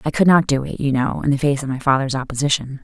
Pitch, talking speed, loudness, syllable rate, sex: 140 Hz, 295 wpm, -18 LUFS, 6.6 syllables/s, female